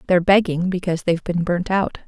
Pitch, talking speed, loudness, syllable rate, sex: 180 Hz, 205 wpm, -19 LUFS, 6.6 syllables/s, female